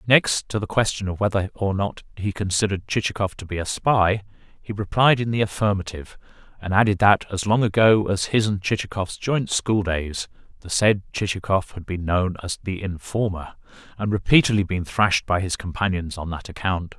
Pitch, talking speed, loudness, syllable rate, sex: 100 Hz, 180 wpm, -22 LUFS, 5.3 syllables/s, male